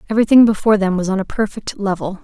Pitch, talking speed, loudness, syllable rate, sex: 205 Hz, 215 wpm, -16 LUFS, 7.4 syllables/s, female